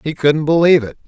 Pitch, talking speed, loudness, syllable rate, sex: 150 Hz, 225 wpm, -14 LUFS, 6.6 syllables/s, male